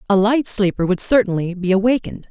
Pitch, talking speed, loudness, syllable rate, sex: 205 Hz, 180 wpm, -18 LUFS, 6.2 syllables/s, female